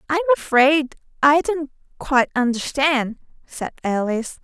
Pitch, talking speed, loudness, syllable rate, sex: 280 Hz, 110 wpm, -19 LUFS, 4.5 syllables/s, female